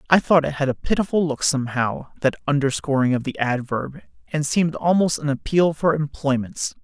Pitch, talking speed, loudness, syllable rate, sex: 145 Hz, 175 wpm, -21 LUFS, 5.5 syllables/s, male